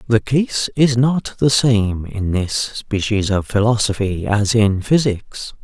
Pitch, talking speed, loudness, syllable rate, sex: 110 Hz, 150 wpm, -17 LUFS, 3.6 syllables/s, male